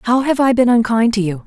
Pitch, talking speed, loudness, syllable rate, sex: 235 Hz, 285 wpm, -15 LUFS, 5.6 syllables/s, female